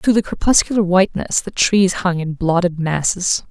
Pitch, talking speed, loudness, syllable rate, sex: 185 Hz, 170 wpm, -17 LUFS, 4.9 syllables/s, female